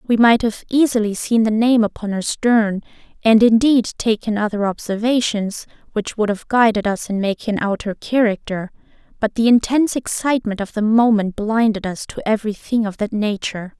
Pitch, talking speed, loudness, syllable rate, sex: 220 Hz, 175 wpm, -18 LUFS, 5.1 syllables/s, female